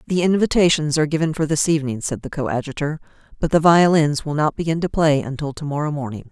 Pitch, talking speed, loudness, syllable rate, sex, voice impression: 155 Hz, 210 wpm, -19 LUFS, 6.5 syllables/s, female, feminine, middle-aged, tensed, powerful, hard, clear, intellectual, calm, elegant, lively, slightly sharp